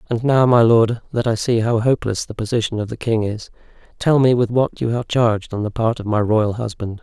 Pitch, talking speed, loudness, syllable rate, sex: 115 Hz, 250 wpm, -18 LUFS, 5.8 syllables/s, male